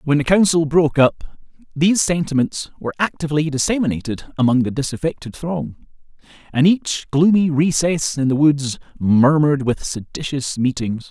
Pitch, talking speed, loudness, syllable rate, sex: 145 Hz, 135 wpm, -18 LUFS, 5.1 syllables/s, male